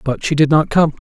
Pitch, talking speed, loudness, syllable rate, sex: 150 Hz, 280 wpm, -15 LUFS, 5.9 syllables/s, male